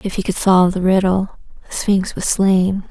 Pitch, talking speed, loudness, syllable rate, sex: 190 Hz, 205 wpm, -16 LUFS, 4.8 syllables/s, female